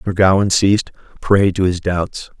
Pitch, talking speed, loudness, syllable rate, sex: 95 Hz, 175 wpm, -16 LUFS, 5.4 syllables/s, male